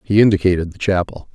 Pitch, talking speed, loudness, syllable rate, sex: 95 Hz, 180 wpm, -17 LUFS, 6.6 syllables/s, male